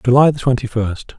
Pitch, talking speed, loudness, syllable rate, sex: 125 Hz, 150 wpm, -16 LUFS, 4.7 syllables/s, male